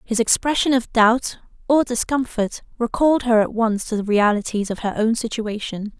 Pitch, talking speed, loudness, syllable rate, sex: 230 Hz, 150 wpm, -20 LUFS, 5.0 syllables/s, female